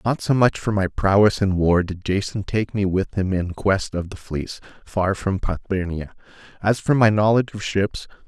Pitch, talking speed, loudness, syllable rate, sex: 100 Hz, 205 wpm, -21 LUFS, 4.9 syllables/s, male